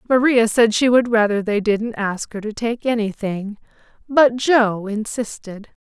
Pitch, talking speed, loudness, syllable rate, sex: 220 Hz, 155 wpm, -18 LUFS, 4.1 syllables/s, female